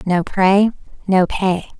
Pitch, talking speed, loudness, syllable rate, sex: 190 Hz, 135 wpm, -16 LUFS, 3.2 syllables/s, female